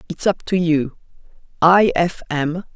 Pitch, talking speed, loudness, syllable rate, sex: 170 Hz, 130 wpm, -18 LUFS, 4.0 syllables/s, female